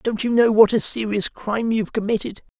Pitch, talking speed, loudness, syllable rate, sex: 220 Hz, 210 wpm, -20 LUFS, 5.8 syllables/s, male